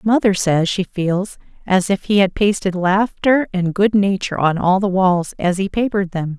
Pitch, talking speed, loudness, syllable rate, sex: 190 Hz, 195 wpm, -17 LUFS, 4.7 syllables/s, female